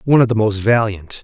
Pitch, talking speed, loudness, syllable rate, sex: 110 Hz, 245 wpm, -16 LUFS, 6.3 syllables/s, male